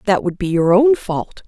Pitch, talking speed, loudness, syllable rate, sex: 195 Hz, 245 wpm, -16 LUFS, 4.6 syllables/s, female